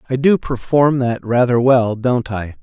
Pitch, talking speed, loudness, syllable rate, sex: 125 Hz, 185 wpm, -16 LUFS, 4.2 syllables/s, male